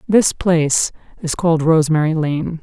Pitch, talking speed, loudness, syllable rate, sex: 160 Hz, 135 wpm, -16 LUFS, 5.0 syllables/s, female